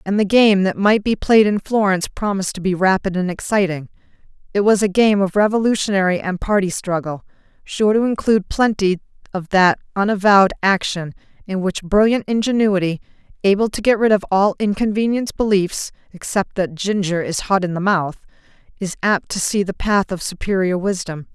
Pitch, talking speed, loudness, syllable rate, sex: 195 Hz, 170 wpm, -18 LUFS, 5.4 syllables/s, female